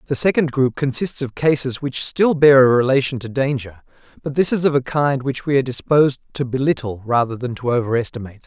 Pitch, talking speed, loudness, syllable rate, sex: 135 Hz, 205 wpm, -18 LUFS, 6.0 syllables/s, male